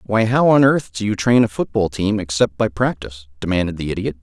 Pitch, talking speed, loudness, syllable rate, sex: 100 Hz, 225 wpm, -18 LUFS, 5.8 syllables/s, male